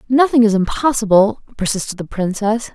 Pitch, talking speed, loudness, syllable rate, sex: 215 Hz, 130 wpm, -16 LUFS, 5.4 syllables/s, female